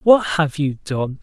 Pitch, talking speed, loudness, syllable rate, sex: 155 Hz, 195 wpm, -19 LUFS, 3.5 syllables/s, male